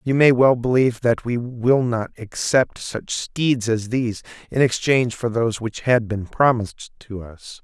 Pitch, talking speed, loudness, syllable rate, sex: 120 Hz, 180 wpm, -20 LUFS, 4.4 syllables/s, male